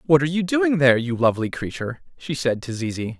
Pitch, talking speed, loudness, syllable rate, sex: 135 Hz, 225 wpm, -22 LUFS, 6.5 syllables/s, male